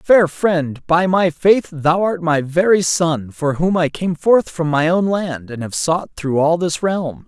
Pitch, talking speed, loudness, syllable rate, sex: 170 Hz, 215 wpm, -17 LUFS, 3.8 syllables/s, male